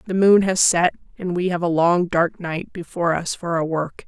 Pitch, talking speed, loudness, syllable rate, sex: 175 Hz, 235 wpm, -20 LUFS, 4.9 syllables/s, female